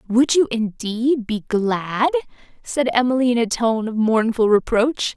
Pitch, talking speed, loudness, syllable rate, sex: 235 Hz, 150 wpm, -19 LUFS, 4.0 syllables/s, female